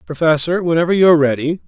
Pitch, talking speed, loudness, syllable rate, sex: 160 Hz, 145 wpm, -14 LUFS, 6.7 syllables/s, male